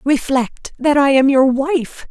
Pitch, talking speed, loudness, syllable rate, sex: 275 Hz, 170 wpm, -15 LUFS, 3.6 syllables/s, female